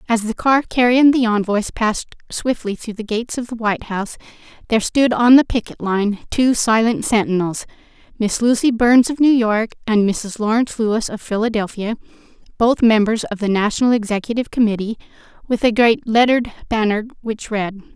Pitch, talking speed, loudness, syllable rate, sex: 225 Hz, 165 wpm, -17 LUFS, 5.5 syllables/s, female